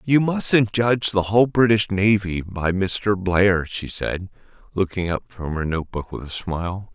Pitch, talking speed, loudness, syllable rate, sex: 100 Hz, 180 wpm, -21 LUFS, 4.3 syllables/s, male